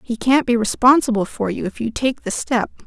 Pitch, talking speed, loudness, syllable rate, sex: 240 Hz, 230 wpm, -18 LUFS, 5.3 syllables/s, female